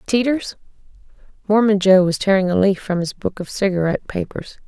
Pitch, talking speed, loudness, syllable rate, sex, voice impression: 195 Hz, 165 wpm, -18 LUFS, 5.7 syllables/s, female, very feminine, slightly young, adult-like, thin, slightly tensed, slightly weak, slightly bright, hard, slightly clear, fluent, slightly raspy, cute, slightly cool, intellectual, refreshing, sincere, very calm, friendly, reassuring, very unique, elegant, very wild, sweet, slightly lively, kind, slightly intense, slightly sharp, modest